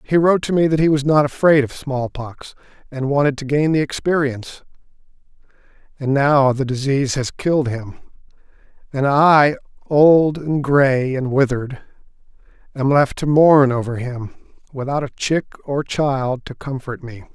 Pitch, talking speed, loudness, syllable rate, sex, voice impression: 140 Hz, 155 wpm, -17 LUFS, 4.7 syllables/s, male, masculine, adult-like, middle-aged, thick, slightly tensed, slightly weak, slightly bright, slightly soft, slightly muffled, slightly halting, slightly cool, intellectual, slightly sincere, calm, mature, slightly friendly, reassuring, unique, wild, slightly lively, kind, modest